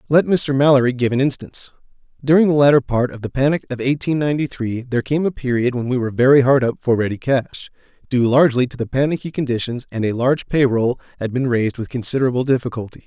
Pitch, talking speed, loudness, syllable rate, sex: 130 Hz, 215 wpm, -18 LUFS, 6.6 syllables/s, male